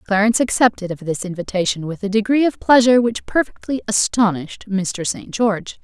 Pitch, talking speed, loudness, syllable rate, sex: 210 Hz, 165 wpm, -18 LUFS, 5.8 syllables/s, female